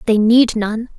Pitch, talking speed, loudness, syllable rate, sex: 225 Hz, 185 wpm, -15 LUFS, 3.9 syllables/s, female